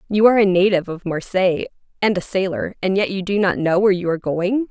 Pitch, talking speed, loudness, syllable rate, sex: 190 Hz, 240 wpm, -19 LUFS, 6.7 syllables/s, female